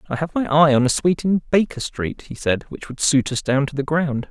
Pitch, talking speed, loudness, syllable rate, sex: 150 Hz, 280 wpm, -20 LUFS, 5.6 syllables/s, male